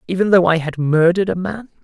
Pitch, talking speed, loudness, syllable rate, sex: 170 Hz, 230 wpm, -16 LUFS, 6.3 syllables/s, male